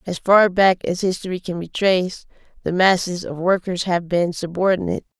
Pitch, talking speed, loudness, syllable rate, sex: 180 Hz, 175 wpm, -19 LUFS, 5.2 syllables/s, female